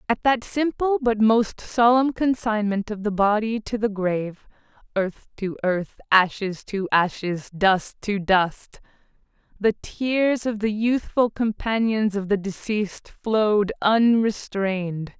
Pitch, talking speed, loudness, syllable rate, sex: 215 Hz, 125 wpm, -22 LUFS, 3.8 syllables/s, female